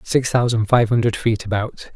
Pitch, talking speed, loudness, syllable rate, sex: 115 Hz, 185 wpm, -18 LUFS, 4.9 syllables/s, male